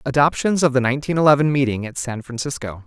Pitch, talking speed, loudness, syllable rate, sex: 135 Hz, 190 wpm, -19 LUFS, 6.5 syllables/s, male